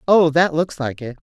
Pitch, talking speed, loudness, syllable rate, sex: 155 Hz, 235 wpm, -18 LUFS, 4.9 syllables/s, female